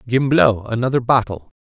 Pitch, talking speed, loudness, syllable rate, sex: 115 Hz, 110 wpm, -17 LUFS, 5.3 syllables/s, male